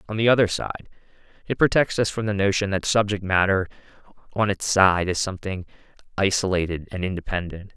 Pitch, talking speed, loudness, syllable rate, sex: 100 Hz, 160 wpm, -22 LUFS, 5.8 syllables/s, male